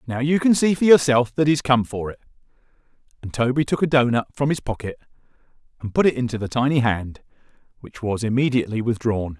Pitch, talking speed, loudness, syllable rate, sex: 125 Hz, 190 wpm, -20 LUFS, 6.1 syllables/s, male